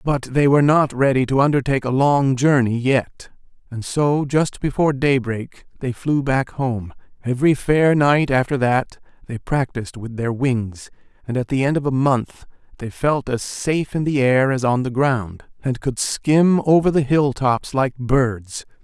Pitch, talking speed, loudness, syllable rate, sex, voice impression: 135 Hz, 180 wpm, -19 LUFS, 4.4 syllables/s, male, masculine, very adult-like, sincere, elegant, slightly wild